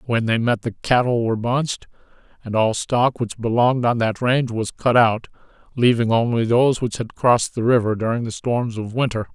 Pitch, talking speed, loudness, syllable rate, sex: 115 Hz, 200 wpm, -20 LUFS, 5.4 syllables/s, male